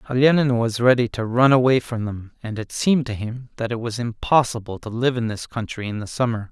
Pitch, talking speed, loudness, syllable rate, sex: 115 Hz, 230 wpm, -21 LUFS, 5.7 syllables/s, male